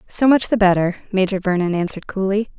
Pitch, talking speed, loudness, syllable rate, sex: 195 Hz, 185 wpm, -18 LUFS, 6.4 syllables/s, female